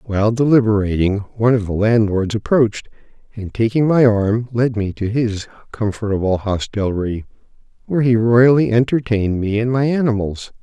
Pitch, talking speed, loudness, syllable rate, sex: 110 Hz, 140 wpm, -17 LUFS, 5.2 syllables/s, male